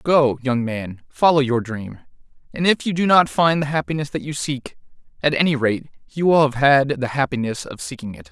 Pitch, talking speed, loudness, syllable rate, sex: 140 Hz, 210 wpm, -19 LUFS, 5.1 syllables/s, male